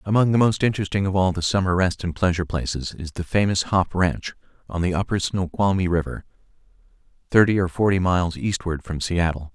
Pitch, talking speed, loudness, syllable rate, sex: 90 Hz, 180 wpm, -22 LUFS, 5.9 syllables/s, male